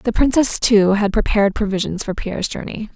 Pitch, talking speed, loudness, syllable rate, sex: 210 Hz, 185 wpm, -17 LUFS, 5.5 syllables/s, female